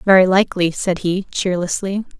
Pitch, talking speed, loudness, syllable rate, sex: 185 Hz, 135 wpm, -18 LUFS, 5.1 syllables/s, female